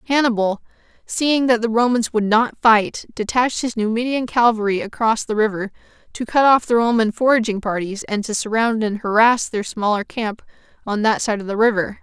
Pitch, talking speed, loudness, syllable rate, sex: 225 Hz, 180 wpm, -18 LUFS, 5.3 syllables/s, female